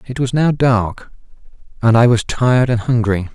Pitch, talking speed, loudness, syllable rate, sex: 120 Hz, 180 wpm, -15 LUFS, 4.8 syllables/s, male